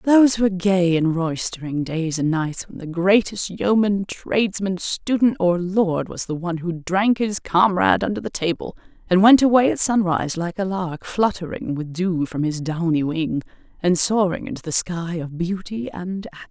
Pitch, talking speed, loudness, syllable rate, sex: 180 Hz, 180 wpm, -21 LUFS, 4.7 syllables/s, female